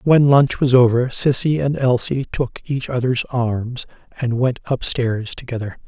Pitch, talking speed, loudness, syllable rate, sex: 125 Hz, 155 wpm, -19 LUFS, 4.2 syllables/s, male